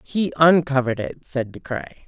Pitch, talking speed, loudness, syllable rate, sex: 140 Hz, 175 wpm, -21 LUFS, 4.9 syllables/s, female